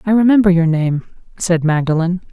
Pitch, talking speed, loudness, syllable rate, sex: 180 Hz, 155 wpm, -15 LUFS, 5.4 syllables/s, female